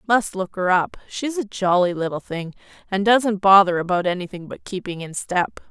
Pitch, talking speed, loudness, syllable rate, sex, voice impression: 190 Hz, 190 wpm, -21 LUFS, 4.9 syllables/s, female, feminine, adult-like, tensed, powerful, clear, intellectual, friendly, lively, intense, sharp